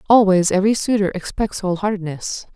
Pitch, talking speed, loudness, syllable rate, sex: 195 Hz, 140 wpm, -19 LUFS, 6.0 syllables/s, female